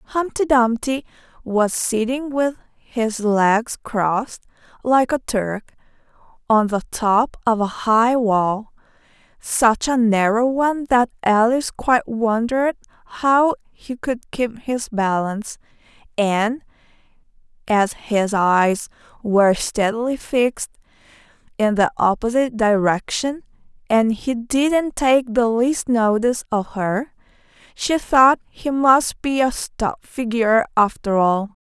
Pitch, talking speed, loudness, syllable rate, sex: 235 Hz, 115 wpm, -19 LUFS, 3.8 syllables/s, female